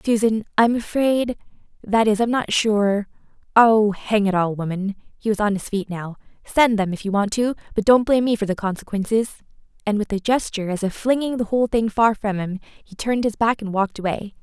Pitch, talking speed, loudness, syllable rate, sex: 215 Hz, 195 wpm, -21 LUFS, 5.6 syllables/s, female